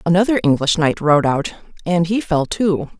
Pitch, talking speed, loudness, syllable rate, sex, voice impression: 170 Hz, 180 wpm, -17 LUFS, 4.7 syllables/s, female, feminine, adult-like, tensed, powerful, slightly hard, clear, fluent, intellectual, calm, elegant, lively, strict, sharp